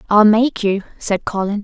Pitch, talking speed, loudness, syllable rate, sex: 210 Hz, 185 wpm, -16 LUFS, 4.7 syllables/s, female